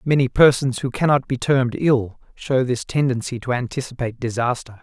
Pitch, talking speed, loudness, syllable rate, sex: 125 Hz, 160 wpm, -20 LUFS, 5.5 syllables/s, male